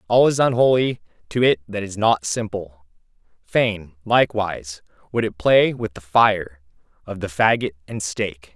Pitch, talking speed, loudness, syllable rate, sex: 100 Hz, 145 wpm, -20 LUFS, 4.6 syllables/s, male